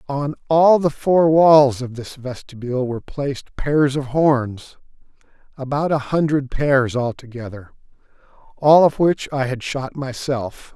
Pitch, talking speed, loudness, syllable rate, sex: 135 Hz, 135 wpm, -18 LUFS, 4.1 syllables/s, male